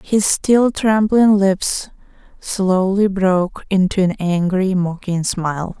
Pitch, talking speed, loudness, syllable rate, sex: 190 Hz, 115 wpm, -17 LUFS, 3.5 syllables/s, female